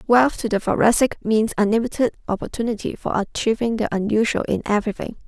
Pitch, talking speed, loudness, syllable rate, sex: 220 Hz, 150 wpm, -21 LUFS, 6.1 syllables/s, female